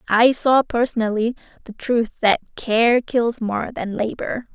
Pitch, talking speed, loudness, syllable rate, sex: 230 Hz, 145 wpm, -20 LUFS, 4.0 syllables/s, female